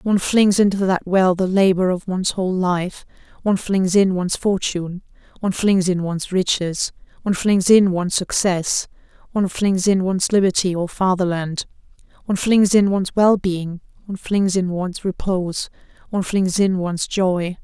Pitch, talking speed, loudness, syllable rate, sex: 185 Hz, 165 wpm, -19 LUFS, 5.3 syllables/s, female